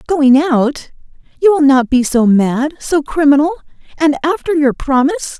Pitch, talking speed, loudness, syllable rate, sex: 285 Hz, 145 wpm, -13 LUFS, 4.7 syllables/s, female